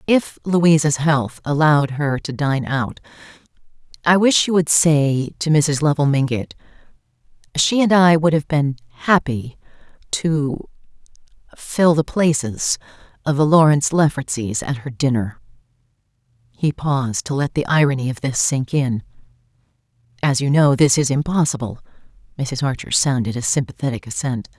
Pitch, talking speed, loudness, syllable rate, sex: 140 Hz, 130 wpm, -18 LUFS, 4.8 syllables/s, female